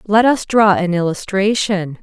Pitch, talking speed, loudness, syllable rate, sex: 195 Hz, 150 wpm, -15 LUFS, 4.2 syllables/s, female